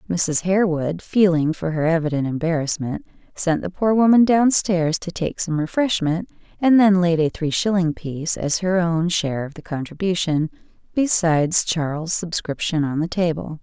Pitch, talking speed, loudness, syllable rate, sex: 170 Hz, 165 wpm, -20 LUFS, 4.8 syllables/s, female